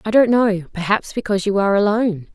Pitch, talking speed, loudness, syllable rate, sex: 205 Hz, 205 wpm, -18 LUFS, 6.5 syllables/s, female